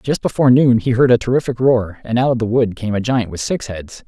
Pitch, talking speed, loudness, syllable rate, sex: 120 Hz, 280 wpm, -16 LUFS, 5.8 syllables/s, male